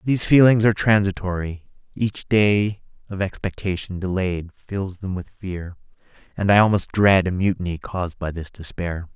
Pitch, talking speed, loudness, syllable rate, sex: 95 Hz, 150 wpm, -21 LUFS, 4.8 syllables/s, male